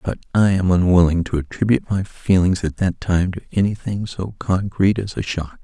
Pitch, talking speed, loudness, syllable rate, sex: 95 Hz, 190 wpm, -19 LUFS, 5.4 syllables/s, male